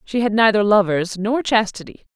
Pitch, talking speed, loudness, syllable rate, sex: 210 Hz, 165 wpm, -17 LUFS, 5.1 syllables/s, female